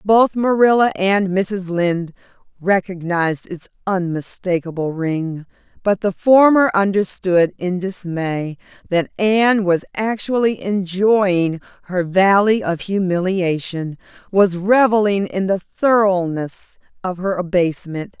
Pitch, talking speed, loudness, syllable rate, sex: 190 Hz, 105 wpm, -18 LUFS, 4.0 syllables/s, female